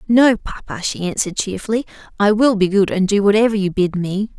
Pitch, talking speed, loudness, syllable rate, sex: 200 Hz, 205 wpm, -17 LUFS, 5.7 syllables/s, female